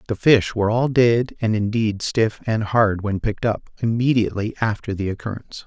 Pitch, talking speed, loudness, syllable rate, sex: 110 Hz, 180 wpm, -20 LUFS, 5.5 syllables/s, male